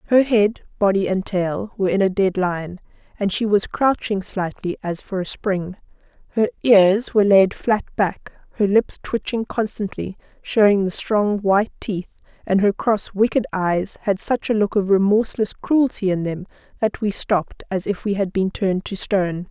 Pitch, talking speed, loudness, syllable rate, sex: 200 Hz, 180 wpm, -20 LUFS, 4.7 syllables/s, female